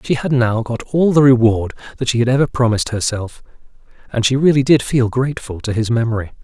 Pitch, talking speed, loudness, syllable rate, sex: 120 Hz, 205 wpm, -16 LUFS, 6.1 syllables/s, male